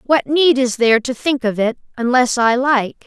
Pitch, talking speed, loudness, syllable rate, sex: 250 Hz, 215 wpm, -16 LUFS, 4.7 syllables/s, female